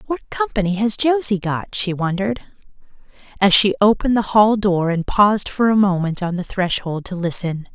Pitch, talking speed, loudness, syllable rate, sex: 200 Hz, 180 wpm, -18 LUFS, 5.2 syllables/s, female